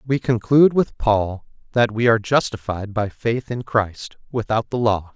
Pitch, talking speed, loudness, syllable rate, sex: 115 Hz, 175 wpm, -20 LUFS, 4.5 syllables/s, male